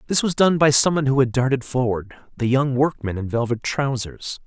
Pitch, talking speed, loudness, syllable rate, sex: 130 Hz, 200 wpm, -20 LUFS, 5.5 syllables/s, male